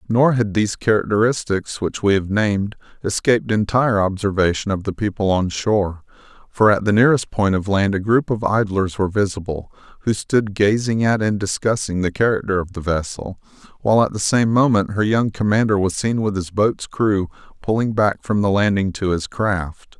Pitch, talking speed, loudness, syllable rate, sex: 100 Hz, 185 wpm, -19 LUFS, 5.3 syllables/s, male